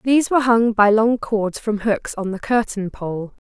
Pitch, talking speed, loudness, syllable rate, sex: 215 Hz, 205 wpm, -19 LUFS, 4.6 syllables/s, female